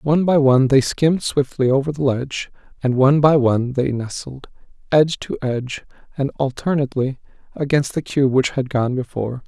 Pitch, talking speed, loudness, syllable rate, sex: 135 Hz, 170 wpm, -19 LUFS, 5.7 syllables/s, male